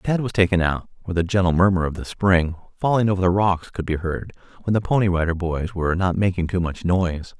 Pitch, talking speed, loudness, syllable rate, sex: 90 Hz, 235 wpm, -21 LUFS, 6.0 syllables/s, male